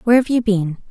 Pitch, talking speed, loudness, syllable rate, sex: 215 Hz, 265 wpm, -17 LUFS, 6.9 syllables/s, female